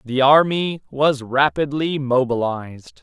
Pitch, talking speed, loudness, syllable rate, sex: 135 Hz, 100 wpm, -18 LUFS, 3.9 syllables/s, male